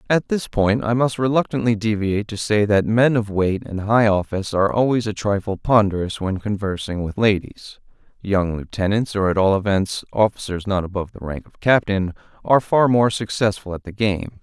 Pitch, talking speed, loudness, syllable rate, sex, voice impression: 105 Hz, 180 wpm, -20 LUFS, 5.3 syllables/s, male, very masculine, very middle-aged, very thick, slightly relaxed, very powerful, slightly bright, soft, slightly muffled, fluent, raspy, cool, very intellectual, slightly refreshing, sincere, very calm, mature, very friendly, reassuring, unique, elegant, wild, slightly sweet, lively, kind, slightly intense